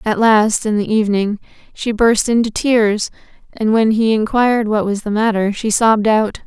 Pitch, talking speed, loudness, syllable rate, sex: 215 Hz, 185 wpm, -15 LUFS, 4.8 syllables/s, female